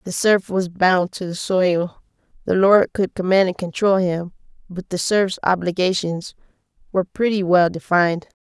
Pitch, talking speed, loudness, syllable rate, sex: 185 Hz, 155 wpm, -19 LUFS, 4.6 syllables/s, female